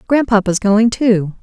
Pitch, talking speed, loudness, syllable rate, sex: 215 Hz, 125 wpm, -14 LUFS, 4.1 syllables/s, female